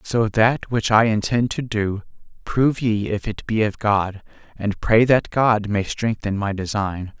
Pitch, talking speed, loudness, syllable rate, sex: 105 Hz, 185 wpm, -20 LUFS, 4.1 syllables/s, male